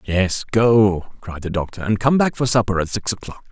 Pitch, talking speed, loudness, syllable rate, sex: 105 Hz, 220 wpm, -19 LUFS, 5.0 syllables/s, male